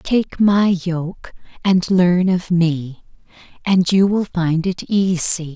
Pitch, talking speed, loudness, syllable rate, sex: 180 Hz, 140 wpm, -17 LUFS, 3.0 syllables/s, female